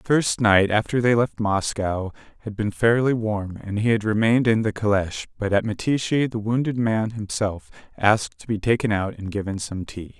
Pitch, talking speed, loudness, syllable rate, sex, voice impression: 110 Hz, 200 wpm, -22 LUFS, 5.1 syllables/s, male, masculine, adult-like, tensed, slightly soft, clear, cool, intellectual, sincere, calm, slightly friendly, reassuring, wild, slightly lively, kind